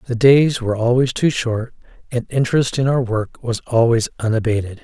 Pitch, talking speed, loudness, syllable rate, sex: 120 Hz, 175 wpm, -18 LUFS, 5.3 syllables/s, male